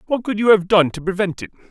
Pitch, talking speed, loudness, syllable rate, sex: 195 Hz, 280 wpm, -17 LUFS, 6.6 syllables/s, male